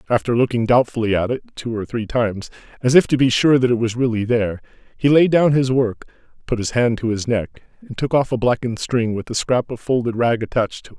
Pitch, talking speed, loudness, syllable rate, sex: 120 Hz, 245 wpm, -19 LUFS, 6.1 syllables/s, male